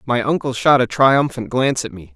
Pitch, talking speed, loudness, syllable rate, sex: 125 Hz, 220 wpm, -17 LUFS, 5.4 syllables/s, male